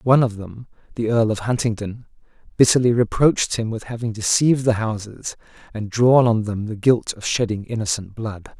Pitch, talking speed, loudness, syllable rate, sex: 115 Hz, 175 wpm, -20 LUFS, 5.4 syllables/s, male